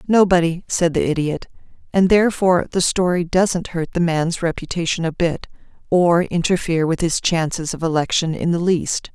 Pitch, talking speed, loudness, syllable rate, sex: 170 Hz, 165 wpm, -19 LUFS, 5.1 syllables/s, female